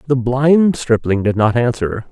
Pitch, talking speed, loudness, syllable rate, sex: 125 Hz, 170 wpm, -15 LUFS, 4.2 syllables/s, male